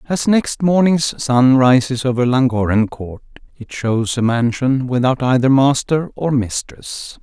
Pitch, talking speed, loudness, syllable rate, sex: 130 Hz, 140 wpm, -16 LUFS, 4.0 syllables/s, male